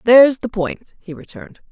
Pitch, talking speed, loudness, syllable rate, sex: 210 Hz, 175 wpm, -15 LUFS, 5.3 syllables/s, female